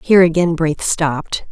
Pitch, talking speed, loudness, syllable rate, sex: 165 Hz, 160 wpm, -16 LUFS, 5.0 syllables/s, female